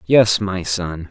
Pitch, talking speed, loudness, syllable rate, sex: 90 Hz, 165 wpm, -18 LUFS, 3.0 syllables/s, male